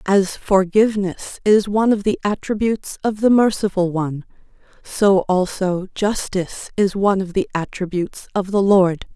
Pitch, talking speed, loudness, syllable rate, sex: 195 Hz, 145 wpm, -19 LUFS, 4.9 syllables/s, female